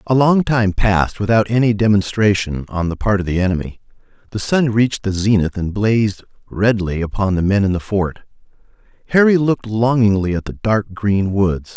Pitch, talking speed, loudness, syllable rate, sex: 105 Hz, 180 wpm, -17 LUFS, 5.2 syllables/s, male